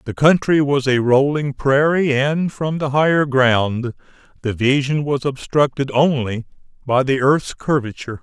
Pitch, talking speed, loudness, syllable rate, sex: 135 Hz, 145 wpm, -17 LUFS, 4.3 syllables/s, male